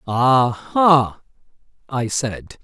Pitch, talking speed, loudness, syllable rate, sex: 130 Hz, 70 wpm, -18 LUFS, 2.4 syllables/s, male